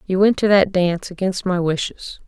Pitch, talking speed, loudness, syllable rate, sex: 185 Hz, 210 wpm, -18 LUFS, 5.2 syllables/s, female